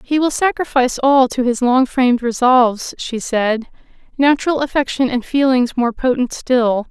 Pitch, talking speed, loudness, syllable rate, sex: 255 Hz, 155 wpm, -16 LUFS, 4.8 syllables/s, female